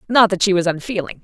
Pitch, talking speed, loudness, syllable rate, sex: 190 Hz, 240 wpm, -17 LUFS, 6.7 syllables/s, female